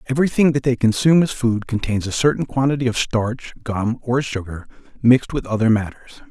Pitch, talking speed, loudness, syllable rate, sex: 120 Hz, 180 wpm, -19 LUFS, 5.8 syllables/s, male